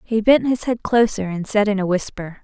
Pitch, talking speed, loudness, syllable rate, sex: 210 Hz, 245 wpm, -19 LUFS, 5.2 syllables/s, female